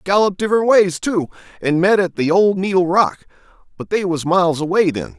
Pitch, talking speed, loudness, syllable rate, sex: 180 Hz, 195 wpm, -16 LUFS, 5.6 syllables/s, male